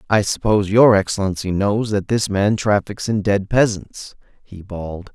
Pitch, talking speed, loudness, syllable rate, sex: 100 Hz, 165 wpm, -18 LUFS, 4.7 syllables/s, male